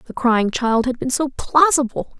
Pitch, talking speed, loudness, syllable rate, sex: 260 Hz, 190 wpm, -18 LUFS, 4.2 syllables/s, female